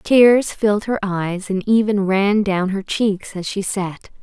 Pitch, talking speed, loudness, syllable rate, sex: 200 Hz, 185 wpm, -18 LUFS, 3.7 syllables/s, female